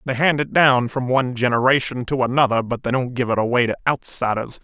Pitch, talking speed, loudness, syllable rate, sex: 125 Hz, 220 wpm, -19 LUFS, 5.9 syllables/s, male